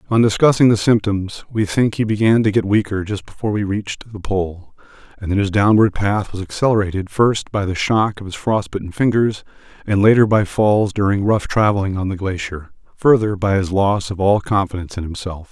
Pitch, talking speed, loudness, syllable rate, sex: 100 Hz, 195 wpm, -17 LUFS, 5.4 syllables/s, male